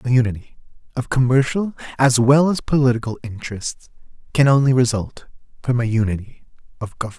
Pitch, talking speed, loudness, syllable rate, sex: 125 Hz, 140 wpm, -19 LUFS, 5.9 syllables/s, male